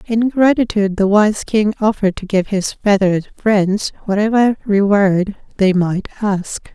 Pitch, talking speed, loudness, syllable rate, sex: 205 Hz, 140 wpm, -16 LUFS, 4.4 syllables/s, female